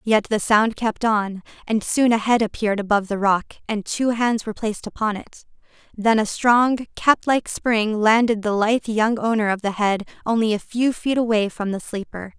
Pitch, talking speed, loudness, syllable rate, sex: 220 Hz, 200 wpm, -20 LUFS, 5.1 syllables/s, female